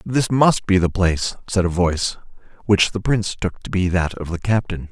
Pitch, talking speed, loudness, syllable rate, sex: 95 Hz, 220 wpm, -20 LUFS, 5.2 syllables/s, male